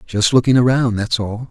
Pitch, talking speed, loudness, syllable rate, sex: 115 Hz, 200 wpm, -16 LUFS, 5.1 syllables/s, male